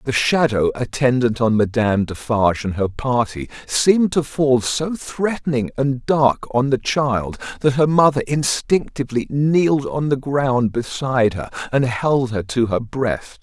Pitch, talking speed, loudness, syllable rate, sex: 130 Hz, 155 wpm, -19 LUFS, 4.3 syllables/s, male